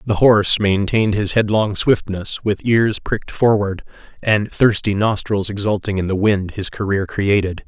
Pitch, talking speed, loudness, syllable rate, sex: 100 Hz, 155 wpm, -17 LUFS, 4.6 syllables/s, male